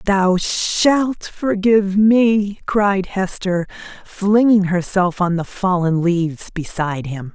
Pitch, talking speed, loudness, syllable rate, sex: 190 Hz, 115 wpm, -17 LUFS, 3.4 syllables/s, female